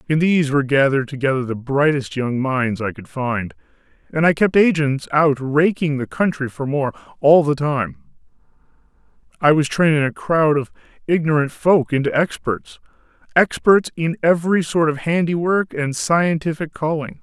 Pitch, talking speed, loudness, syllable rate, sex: 145 Hz, 150 wpm, -18 LUFS, 4.8 syllables/s, male